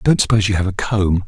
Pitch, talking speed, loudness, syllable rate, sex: 100 Hz, 330 wpm, -17 LUFS, 7.4 syllables/s, male